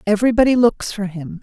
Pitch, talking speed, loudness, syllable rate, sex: 210 Hz, 170 wpm, -17 LUFS, 6.1 syllables/s, female